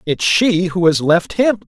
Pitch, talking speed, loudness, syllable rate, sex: 185 Hz, 210 wpm, -15 LUFS, 4.0 syllables/s, female